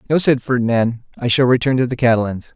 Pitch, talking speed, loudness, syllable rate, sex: 125 Hz, 210 wpm, -17 LUFS, 5.9 syllables/s, male